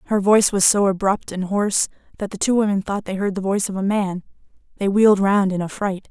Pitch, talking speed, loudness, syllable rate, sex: 200 Hz, 235 wpm, -19 LUFS, 6.2 syllables/s, female